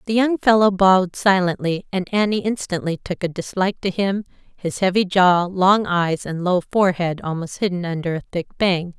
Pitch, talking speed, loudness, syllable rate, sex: 185 Hz, 180 wpm, -19 LUFS, 5.2 syllables/s, female